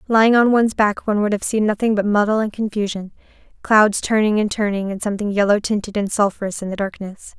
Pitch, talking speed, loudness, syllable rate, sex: 210 Hz, 205 wpm, -18 LUFS, 6.3 syllables/s, female